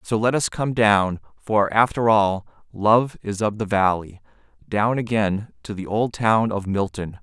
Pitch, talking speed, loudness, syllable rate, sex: 105 Hz, 175 wpm, -21 LUFS, 4.1 syllables/s, male